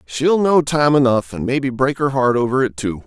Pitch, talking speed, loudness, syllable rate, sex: 130 Hz, 235 wpm, -17 LUFS, 5.1 syllables/s, male